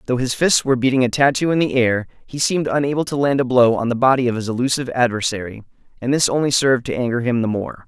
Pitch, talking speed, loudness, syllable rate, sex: 125 Hz, 250 wpm, -18 LUFS, 6.8 syllables/s, male